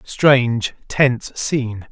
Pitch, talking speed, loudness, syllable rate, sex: 125 Hz, 95 wpm, -18 LUFS, 3.6 syllables/s, male